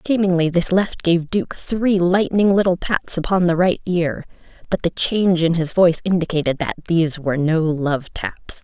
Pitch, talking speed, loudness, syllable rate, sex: 175 Hz, 180 wpm, -19 LUFS, 4.9 syllables/s, female